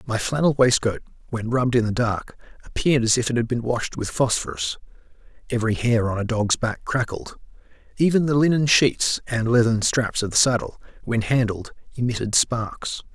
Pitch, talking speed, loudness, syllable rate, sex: 120 Hz, 165 wpm, -22 LUFS, 5.2 syllables/s, male